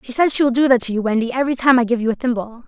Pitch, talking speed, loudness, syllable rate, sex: 245 Hz, 360 wpm, -17 LUFS, 7.9 syllables/s, female